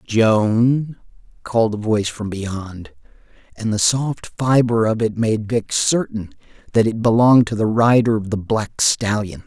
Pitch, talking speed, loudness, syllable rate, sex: 110 Hz, 160 wpm, -18 LUFS, 4.2 syllables/s, male